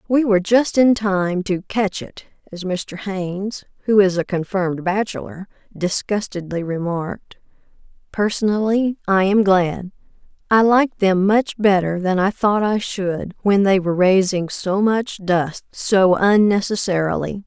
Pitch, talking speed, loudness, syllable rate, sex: 195 Hz, 135 wpm, -18 LUFS, 4.2 syllables/s, female